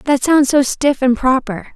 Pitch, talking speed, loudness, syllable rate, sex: 265 Hz, 205 wpm, -14 LUFS, 4.1 syllables/s, female